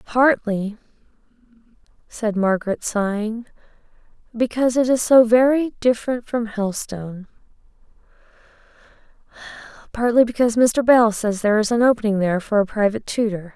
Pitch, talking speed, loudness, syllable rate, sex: 225 Hz, 110 wpm, -19 LUFS, 5.4 syllables/s, female